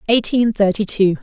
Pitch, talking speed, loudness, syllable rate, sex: 210 Hz, 145 wpm, -16 LUFS, 4.9 syllables/s, female